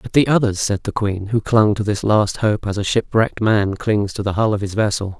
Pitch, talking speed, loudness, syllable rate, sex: 105 Hz, 265 wpm, -18 LUFS, 5.2 syllables/s, male